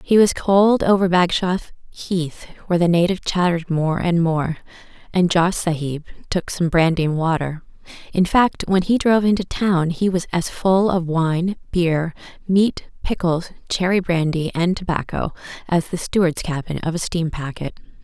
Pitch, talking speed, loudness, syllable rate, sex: 175 Hz, 165 wpm, -20 LUFS, 4.7 syllables/s, female